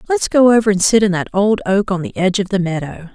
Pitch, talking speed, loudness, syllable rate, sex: 195 Hz, 285 wpm, -15 LUFS, 6.3 syllables/s, female